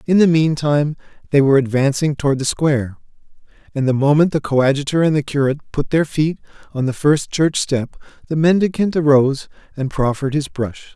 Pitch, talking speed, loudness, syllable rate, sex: 145 Hz, 175 wpm, -17 LUFS, 6.0 syllables/s, male